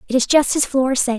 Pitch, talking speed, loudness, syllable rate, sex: 260 Hz, 305 wpm, -17 LUFS, 6.6 syllables/s, female